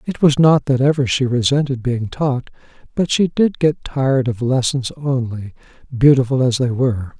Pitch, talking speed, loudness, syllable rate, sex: 130 Hz, 175 wpm, -17 LUFS, 4.9 syllables/s, male